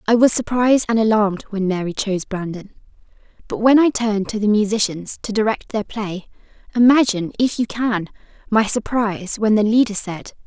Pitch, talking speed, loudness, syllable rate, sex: 215 Hz, 170 wpm, -18 LUFS, 5.6 syllables/s, female